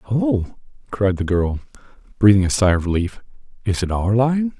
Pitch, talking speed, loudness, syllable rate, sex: 100 Hz, 170 wpm, -19 LUFS, 5.0 syllables/s, male